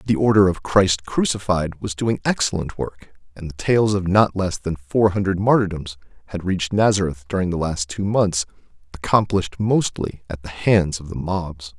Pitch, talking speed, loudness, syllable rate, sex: 95 Hz, 180 wpm, -20 LUFS, 4.8 syllables/s, male